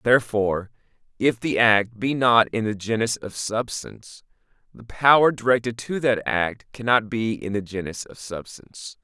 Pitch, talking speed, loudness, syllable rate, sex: 115 Hz, 160 wpm, -22 LUFS, 4.7 syllables/s, male